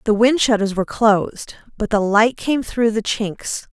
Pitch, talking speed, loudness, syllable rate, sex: 220 Hz, 190 wpm, -18 LUFS, 4.8 syllables/s, female